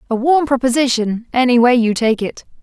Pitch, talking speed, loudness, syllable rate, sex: 245 Hz, 185 wpm, -15 LUFS, 5.3 syllables/s, female